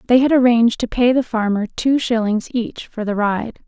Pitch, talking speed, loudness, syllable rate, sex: 230 Hz, 210 wpm, -18 LUFS, 5.1 syllables/s, female